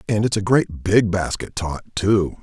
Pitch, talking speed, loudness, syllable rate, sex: 100 Hz, 200 wpm, -20 LUFS, 4.2 syllables/s, male